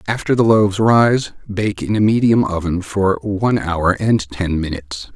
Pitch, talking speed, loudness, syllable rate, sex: 100 Hz, 175 wpm, -17 LUFS, 4.5 syllables/s, male